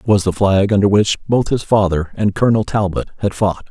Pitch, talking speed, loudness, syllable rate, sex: 100 Hz, 225 wpm, -16 LUFS, 5.6 syllables/s, male